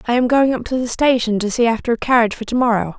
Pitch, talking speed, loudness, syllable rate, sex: 235 Hz, 300 wpm, -17 LUFS, 7.1 syllables/s, female